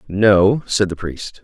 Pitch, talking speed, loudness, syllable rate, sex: 100 Hz, 170 wpm, -16 LUFS, 3.2 syllables/s, male